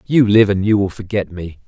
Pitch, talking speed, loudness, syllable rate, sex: 100 Hz, 250 wpm, -15 LUFS, 5.3 syllables/s, male